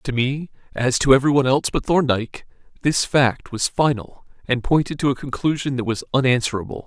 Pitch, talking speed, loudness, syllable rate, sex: 135 Hz, 175 wpm, -20 LUFS, 5.7 syllables/s, male